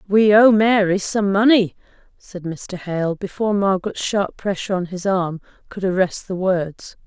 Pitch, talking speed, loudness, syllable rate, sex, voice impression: 190 Hz, 160 wpm, -19 LUFS, 4.6 syllables/s, female, feminine, gender-neutral, adult-like, middle-aged, slightly thin, relaxed, slightly weak, dark, slightly soft, muffled, slightly halting, slightly raspy, slightly cool, intellectual, very sincere, very calm, slightly friendly, slightly reassuring, very unique, elegant, slightly wild, slightly sweet, kind, slightly modest, slightly light